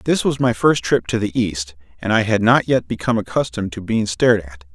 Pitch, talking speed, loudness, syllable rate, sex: 105 Hz, 240 wpm, -18 LUFS, 5.6 syllables/s, male